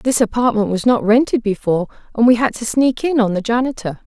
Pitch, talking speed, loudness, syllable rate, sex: 230 Hz, 215 wpm, -16 LUFS, 5.9 syllables/s, female